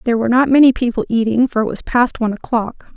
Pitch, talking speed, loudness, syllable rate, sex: 240 Hz, 245 wpm, -15 LUFS, 7.0 syllables/s, female